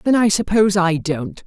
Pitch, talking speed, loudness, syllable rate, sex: 185 Hz, 205 wpm, -17 LUFS, 5.2 syllables/s, male